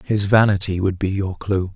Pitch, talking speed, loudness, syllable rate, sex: 95 Hz, 205 wpm, -19 LUFS, 4.9 syllables/s, male